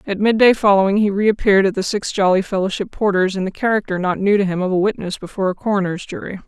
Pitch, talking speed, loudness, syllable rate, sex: 195 Hz, 240 wpm, -17 LUFS, 6.7 syllables/s, female